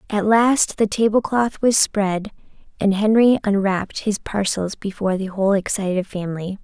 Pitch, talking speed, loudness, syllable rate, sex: 205 Hz, 145 wpm, -19 LUFS, 4.9 syllables/s, female